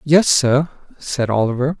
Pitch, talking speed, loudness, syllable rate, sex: 135 Hz, 135 wpm, -17 LUFS, 4.2 syllables/s, male